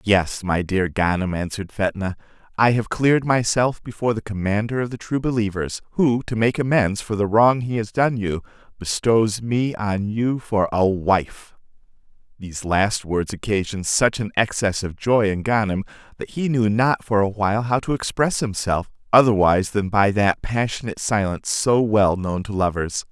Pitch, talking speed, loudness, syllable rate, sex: 105 Hz, 175 wpm, -21 LUFS, 4.9 syllables/s, male